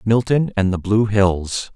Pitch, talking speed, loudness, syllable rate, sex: 105 Hz, 170 wpm, -18 LUFS, 3.8 syllables/s, male